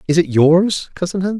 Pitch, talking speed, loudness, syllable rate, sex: 175 Hz, 215 wpm, -15 LUFS, 5.8 syllables/s, male